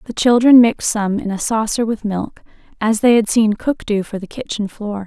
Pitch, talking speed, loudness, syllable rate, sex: 220 Hz, 225 wpm, -16 LUFS, 5.1 syllables/s, female